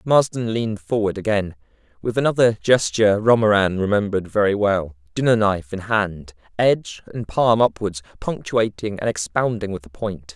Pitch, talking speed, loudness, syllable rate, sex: 105 Hz, 140 wpm, -20 LUFS, 5.1 syllables/s, male